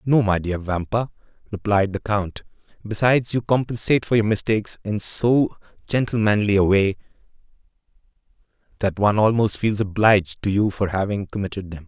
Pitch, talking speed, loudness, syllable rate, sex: 105 Hz, 145 wpm, -21 LUFS, 5.5 syllables/s, male